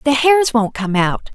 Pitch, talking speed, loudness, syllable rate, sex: 250 Hz, 220 wpm, -15 LUFS, 4.1 syllables/s, female